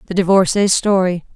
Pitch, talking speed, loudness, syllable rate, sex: 185 Hz, 135 wpm, -15 LUFS, 5.4 syllables/s, female